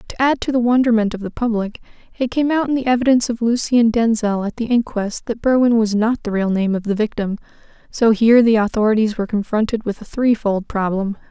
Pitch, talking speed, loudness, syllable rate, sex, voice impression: 225 Hz, 220 wpm, -18 LUFS, 6.0 syllables/s, female, feminine, slightly adult-like, slightly soft, slightly cute, slightly intellectual, slightly calm, friendly, kind